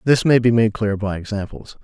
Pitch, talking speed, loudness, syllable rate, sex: 110 Hz, 230 wpm, -18 LUFS, 5.4 syllables/s, male